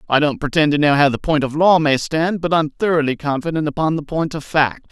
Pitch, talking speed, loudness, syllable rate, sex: 150 Hz, 255 wpm, -17 LUFS, 5.7 syllables/s, male